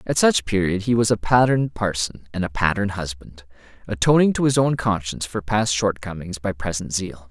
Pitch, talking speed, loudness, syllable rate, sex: 100 Hz, 190 wpm, -21 LUFS, 5.2 syllables/s, male